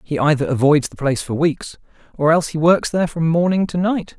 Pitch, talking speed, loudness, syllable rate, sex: 155 Hz, 230 wpm, -18 LUFS, 5.9 syllables/s, male